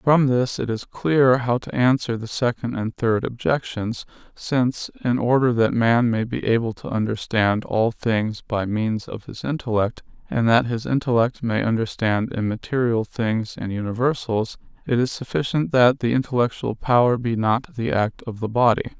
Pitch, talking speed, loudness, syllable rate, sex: 120 Hz, 170 wpm, -22 LUFS, 4.6 syllables/s, male